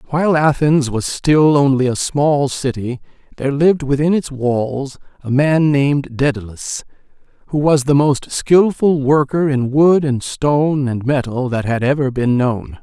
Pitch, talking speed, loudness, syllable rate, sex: 140 Hz, 160 wpm, -16 LUFS, 4.4 syllables/s, male